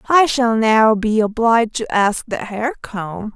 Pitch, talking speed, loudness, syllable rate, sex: 225 Hz, 180 wpm, -17 LUFS, 3.9 syllables/s, female